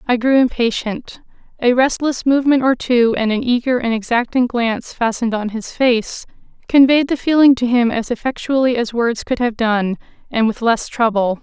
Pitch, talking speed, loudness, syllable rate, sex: 240 Hz, 180 wpm, -16 LUFS, 5.0 syllables/s, female